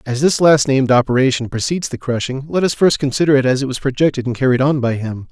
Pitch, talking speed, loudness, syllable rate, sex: 135 Hz, 250 wpm, -16 LUFS, 6.6 syllables/s, male